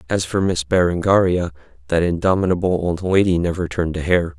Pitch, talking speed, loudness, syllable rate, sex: 90 Hz, 165 wpm, -19 LUFS, 5.8 syllables/s, male